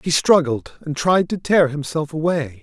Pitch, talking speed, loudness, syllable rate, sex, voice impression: 155 Hz, 185 wpm, -19 LUFS, 4.4 syllables/s, male, very masculine, old, tensed, slightly powerful, slightly dark, slightly soft, muffled, slightly fluent, raspy, cool, intellectual, refreshing, very sincere, calm, very mature, friendly, reassuring, very unique, slightly elegant, very wild, sweet, lively, slightly strict, intense, slightly modest